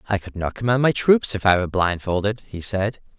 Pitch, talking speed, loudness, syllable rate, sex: 100 Hz, 225 wpm, -21 LUFS, 5.7 syllables/s, male